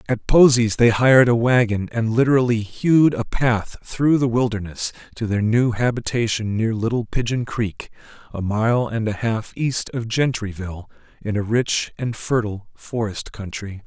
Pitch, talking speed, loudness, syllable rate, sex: 115 Hz, 160 wpm, -20 LUFS, 4.6 syllables/s, male